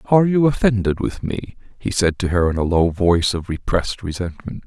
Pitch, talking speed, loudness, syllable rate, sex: 100 Hz, 205 wpm, -19 LUFS, 5.6 syllables/s, male